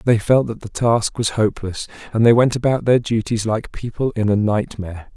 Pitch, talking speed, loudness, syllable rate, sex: 110 Hz, 210 wpm, -18 LUFS, 5.2 syllables/s, male